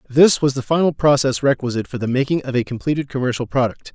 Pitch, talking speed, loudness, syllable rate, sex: 135 Hz, 215 wpm, -18 LUFS, 6.6 syllables/s, male